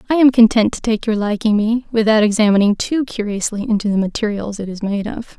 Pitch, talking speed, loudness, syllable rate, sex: 215 Hz, 210 wpm, -16 LUFS, 5.8 syllables/s, female